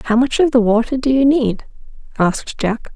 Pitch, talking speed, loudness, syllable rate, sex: 240 Hz, 205 wpm, -16 LUFS, 5.4 syllables/s, female